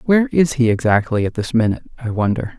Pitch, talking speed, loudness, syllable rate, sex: 125 Hz, 210 wpm, -18 LUFS, 6.7 syllables/s, male